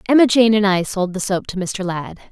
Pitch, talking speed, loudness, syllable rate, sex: 200 Hz, 260 wpm, -17 LUFS, 5.3 syllables/s, female